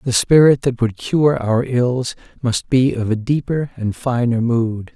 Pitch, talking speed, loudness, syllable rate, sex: 125 Hz, 180 wpm, -17 LUFS, 4.0 syllables/s, male